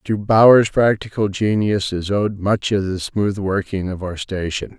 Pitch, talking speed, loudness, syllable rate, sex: 100 Hz, 175 wpm, -18 LUFS, 4.3 syllables/s, male